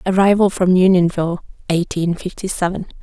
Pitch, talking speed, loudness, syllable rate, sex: 180 Hz, 120 wpm, -17 LUFS, 5.5 syllables/s, female